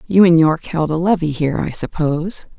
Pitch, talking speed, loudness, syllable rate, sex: 165 Hz, 210 wpm, -16 LUFS, 5.9 syllables/s, female